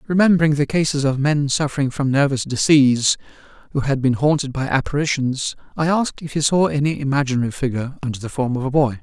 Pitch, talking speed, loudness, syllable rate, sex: 140 Hz, 195 wpm, -19 LUFS, 6.3 syllables/s, male